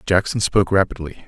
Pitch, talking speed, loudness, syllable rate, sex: 95 Hz, 140 wpm, -19 LUFS, 6.6 syllables/s, male